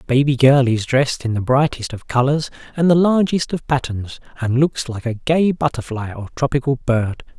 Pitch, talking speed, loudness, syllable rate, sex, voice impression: 135 Hz, 195 wpm, -18 LUFS, 5.1 syllables/s, male, masculine, adult-like, tensed, slightly weak, hard, slightly raspy, intellectual, calm, friendly, reassuring, kind, slightly modest